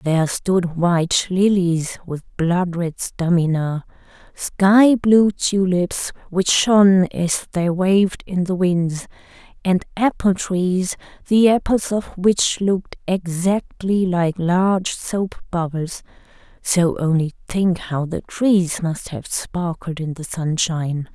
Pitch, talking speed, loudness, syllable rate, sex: 180 Hz, 120 wpm, -19 LUFS, 3.5 syllables/s, female